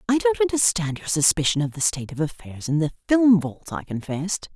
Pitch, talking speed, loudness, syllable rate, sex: 170 Hz, 210 wpm, -22 LUFS, 5.7 syllables/s, female